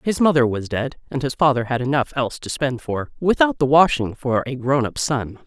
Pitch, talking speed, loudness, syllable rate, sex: 135 Hz, 230 wpm, -20 LUFS, 5.3 syllables/s, female